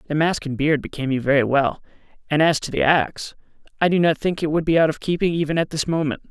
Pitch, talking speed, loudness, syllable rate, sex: 155 Hz, 255 wpm, -20 LUFS, 6.5 syllables/s, male